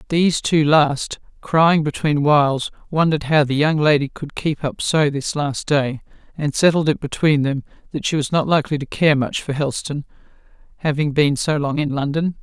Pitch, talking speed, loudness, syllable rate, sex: 150 Hz, 190 wpm, -19 LUFS, 5.1 syllables/s, female